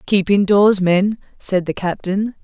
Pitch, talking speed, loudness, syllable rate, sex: 195 Hz, 150 wpm, -17 LUFS, 3.9 syllables/s, female